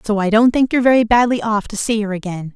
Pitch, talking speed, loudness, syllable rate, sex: 220 Hz, 280 wpm, -16 LUFS, 6.6 syllables/s, female